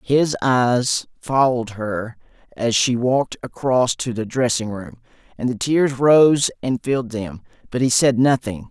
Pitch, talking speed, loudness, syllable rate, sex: 125 Hz, 160 wpm, -19 LUFS, 4.1 syllables/s, male